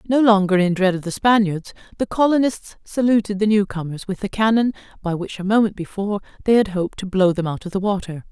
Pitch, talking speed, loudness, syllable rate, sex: 200 Hz, 225 wpm, -20 LUFS, 6.1 syllables/s, female